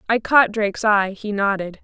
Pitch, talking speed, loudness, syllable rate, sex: 210 Hz, 195 wpm, -18 LUFS, 4.9 syllables/s, female